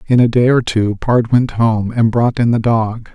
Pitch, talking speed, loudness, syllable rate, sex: 115 Hz, 250 wpm, -14 LUFS, 4.4 syllables/s, male